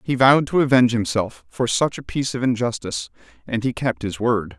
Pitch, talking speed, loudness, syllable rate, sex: 120 Hz, 210 wpm, -20 LUFS, 5.9 syllables/s, male